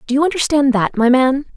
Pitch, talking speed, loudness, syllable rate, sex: 270 Hz, 230 wpm, -15 LUFS, 6.0 syllables/s, female